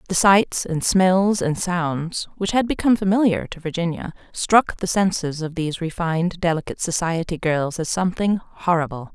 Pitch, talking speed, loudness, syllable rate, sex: 175 Hz, 155 wpm, -21 LUFS, 5.0 syllables/s, female